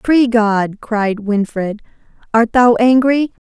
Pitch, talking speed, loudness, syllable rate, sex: 225 Hz, 120 wpm, -14 LUFS, 3.3 syllables/s, female